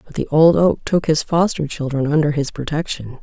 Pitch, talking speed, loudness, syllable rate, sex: 150 Hz, 205 wpm, -18 LUFS, 5.3 syllables/s, female